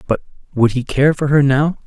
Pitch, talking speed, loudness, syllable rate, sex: 140 Hz, 225 wpm, -16 LUFS, 5.2 syllables/s, male